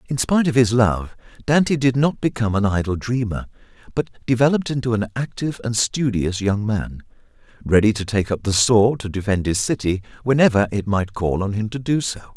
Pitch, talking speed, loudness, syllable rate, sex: 115 Hz, 195 wpm, -20 LUFS, 5.6 syllables/s, male